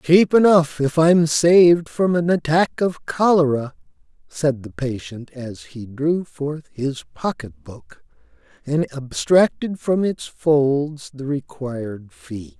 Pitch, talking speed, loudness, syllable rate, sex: 150 Hz, 140 wpm, -19 LUFS, 3.6 syllables/s, male